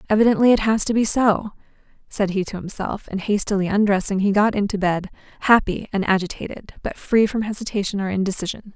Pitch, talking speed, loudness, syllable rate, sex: 205 Hz, 180 wpm, -20 LUFS, 5.9 syllables/s, female